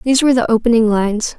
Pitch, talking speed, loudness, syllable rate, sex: 230 Hz, 215 wpm, -14 LUFS, 7.6 syllables/s, female